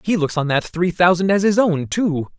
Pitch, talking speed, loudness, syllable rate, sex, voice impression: 175 Hz, 250 wpm, -18 LUFS, 4.9 syllables/s, male, masculine, adult-like, tensed, powerful, bright, clear, fluent, slightly intellectual, slightly refreshing, friendly, slightly unique, lively, kind